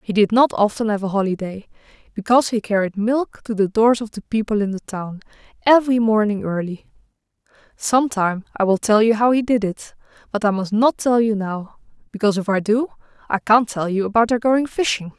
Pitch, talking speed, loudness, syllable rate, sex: 215 Hz, 200 wpm, -19 LUFS, 5.7 syllables/s, female